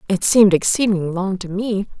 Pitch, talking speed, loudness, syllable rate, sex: 195 Hz, 180 wpm, -17 LUFS, 5.8 syllables/s, female